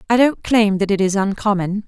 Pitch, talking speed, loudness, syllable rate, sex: 205 Hz, 225 wpm, -17 LUFS, 5.4 syllables/s, female